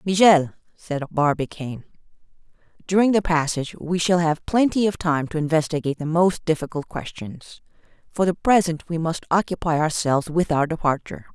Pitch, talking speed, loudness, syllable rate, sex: 165 Hz, 150 wpm, -21 LUFS, 5.6 syllables/s, female